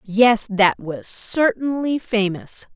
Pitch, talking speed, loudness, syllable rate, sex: 215 Hz, 110 wpm, -19 LUFS, 3.1 syllables/s, female